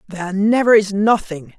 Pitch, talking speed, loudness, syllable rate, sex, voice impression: 200 Hz, 150 wpm, -16 LUFS, 5.0 syllables/s, female, very feminine, middle-aged, very thin, slightly tensed, powerful, slightly dark, slightly soft, clear, fluent, slightly raspy, slightly cool, intellectual, slightly refreshing, slightly sincere, calm, slightly friendly, reassuring, unique, elegant, slightly wild, sweet, lively, strict, slightly intense, slightly sharp, slightly light